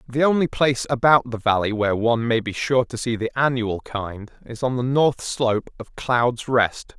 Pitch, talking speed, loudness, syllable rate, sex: 120 Hz, 205 wpm, -21 LUFS, 4.9 syllables/s, male